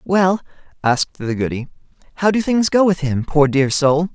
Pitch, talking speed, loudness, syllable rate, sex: 160 Hz, 190 wpm, -17 LUFS, 4.9 syllables/s, male